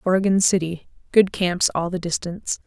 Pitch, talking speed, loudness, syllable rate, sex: 180 Hz, 135 wpm, -21 LUFS, 5.3 syllables/s, female